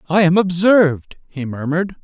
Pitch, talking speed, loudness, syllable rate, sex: 170 Hz, 150 wpm, -15 LUFS, 5.3 syllables/s, male